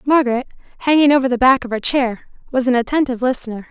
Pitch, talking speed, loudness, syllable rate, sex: 255 Hz, 195 wpm, -17 LUFS, 6.9 syllables/s, female